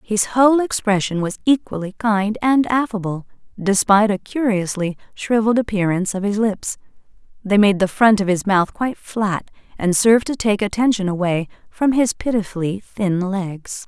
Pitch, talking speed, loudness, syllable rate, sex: 205 Hz, 155 wpm, -18 LUFS, 5.0 syllables/s, female